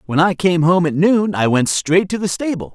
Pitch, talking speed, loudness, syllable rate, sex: 180 Hz, 260 wpm, -16 LUFS, 5.0 syllables/s, male